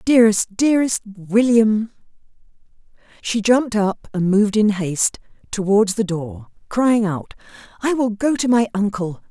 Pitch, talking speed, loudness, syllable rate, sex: 210 Hz, 135 wpm, -18 LUFS, 4.6 syllables/s, female